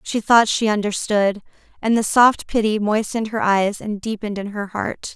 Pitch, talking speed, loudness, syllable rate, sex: 210 Hz, 185 wpm, -19 LUFS, 4.9 syllables/s, female